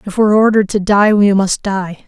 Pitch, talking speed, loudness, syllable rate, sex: 200 Hz, 260 wpm, -13 LUFS, 6.4 syllables/s, female